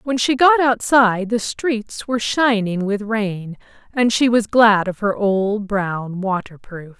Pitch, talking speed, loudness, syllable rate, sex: 215 Hz, 165 wpm, -18 LUFS, 3.8 syllables/s, female